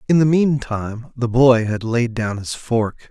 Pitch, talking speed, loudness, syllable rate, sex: 120 Hz, 195 wpm, -18 LUFS, 4.1 syllables/s, male